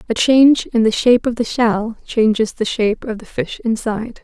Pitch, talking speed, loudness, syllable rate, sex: 225 Hz, 215 wpm, -16 LUFS, 5.3 syllables/s, female